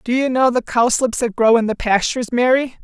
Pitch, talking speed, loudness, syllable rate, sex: 240 Hz, 235 wpm, -17 LUFS, 5.7 syllables/s, female